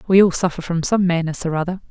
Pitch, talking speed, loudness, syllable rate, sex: 175 Hz, 250 wpm, -19 LUFS, 6.6 syllables/s, female